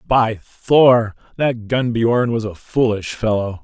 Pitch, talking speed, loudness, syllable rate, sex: 115 Hz, 130 wpm, -17 LUFS, 3.4 syllables/s, male